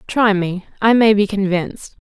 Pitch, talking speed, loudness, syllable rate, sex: 205 Hz, 180 wpm, -16 LUFS, 4.7 syllables/s, female